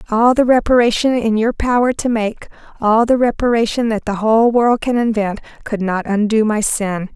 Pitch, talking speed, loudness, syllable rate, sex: 225 Hz, 175 wpm, -15 LUFS, 5.1 syllables/s, female